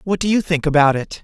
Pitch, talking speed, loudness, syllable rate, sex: 165 Hz, 290 wpm, -17 LUFS, 6.2 syllables/s, male